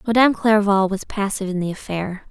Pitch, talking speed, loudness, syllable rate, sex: 200 Hz, 180 wpm, -20 LUFS, 6.0 syllables/s, female